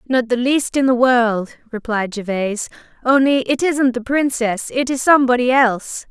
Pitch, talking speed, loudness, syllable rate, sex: 245 Hz, 155 wpm, -17 LUFS, 4.9 syllables/s, female